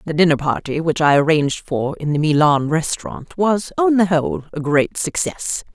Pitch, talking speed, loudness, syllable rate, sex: 160 Hz, 190 wpm, -18 LUFS, 5.0 syllables/s, female